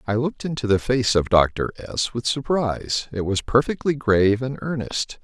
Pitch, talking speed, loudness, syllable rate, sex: 120 Hz, 185 wpm, -22 LUFS, 4.8 syllables/s, male